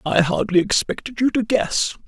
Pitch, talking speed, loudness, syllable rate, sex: 215 Hz, 175 wpm, -20 LUFS, 4.8 syllables/s, male